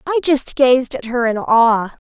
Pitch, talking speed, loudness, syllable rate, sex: 250 Hz, 200 wpm, -15 LUFS, 4.1 syllables/s, female